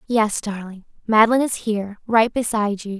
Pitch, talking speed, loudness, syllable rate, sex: 215 Hz, 140 wpm, -20 LUFS, 5.1 syllables/s, female